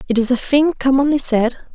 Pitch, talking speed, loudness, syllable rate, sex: 260 Hz, 205 wpm, -16 LUFS, 5.9 syllables/s, female